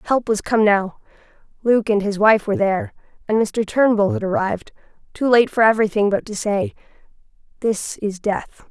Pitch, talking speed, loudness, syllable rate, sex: 215 Hz, 170 wpm, -19 LUFS, 5.2 syllables/s, female